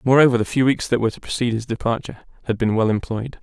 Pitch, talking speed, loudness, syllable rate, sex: 120 Hz, 245 wpm, -20 LUFS, 7.5 syllables/s, male